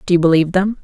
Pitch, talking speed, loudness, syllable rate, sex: 180 Hz, 290 wpm, -14 LUFS, 8.7 syllables/s, female